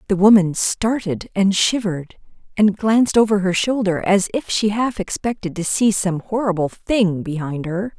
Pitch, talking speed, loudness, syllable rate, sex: 200 Hz, 165 wpm, -18 LUFS, 4.6 syllables/s, female